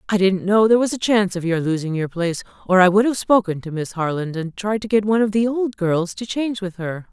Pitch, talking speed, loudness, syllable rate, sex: 195 Hz, 280 wpm, -19 LUFS, 6.1 syllables/s, female